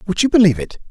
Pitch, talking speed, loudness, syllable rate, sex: 180 Hz, 265 wpm, -14 LUFS, 8.7 syllables/s, male